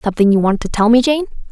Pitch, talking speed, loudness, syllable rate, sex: 230 Hz, 275 wpm, -14 LUFS, 8.0 syllables/s, female